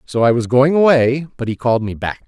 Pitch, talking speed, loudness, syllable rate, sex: 130 Hz, 265 wpm, -16 LUFS, 5.8 syllables/s, male